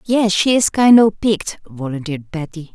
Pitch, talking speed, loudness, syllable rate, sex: 190 Hz, 175 wpm, -15 LUFS, 5.0 syllables/s, female